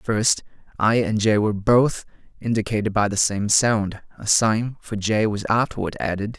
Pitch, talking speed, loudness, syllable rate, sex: 110 Hz, 180 wpm, -21 LUFS, 4.7 syllables/s, male